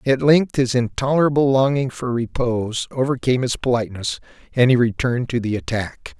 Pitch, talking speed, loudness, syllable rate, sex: 125 Hz, 155 wpm, -19 LUFS, 5.6 syllables/s, male